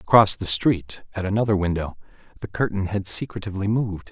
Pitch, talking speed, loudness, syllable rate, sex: 100 Hz, 160 wpm, -22 LUFS, 6.0 syllables/s, male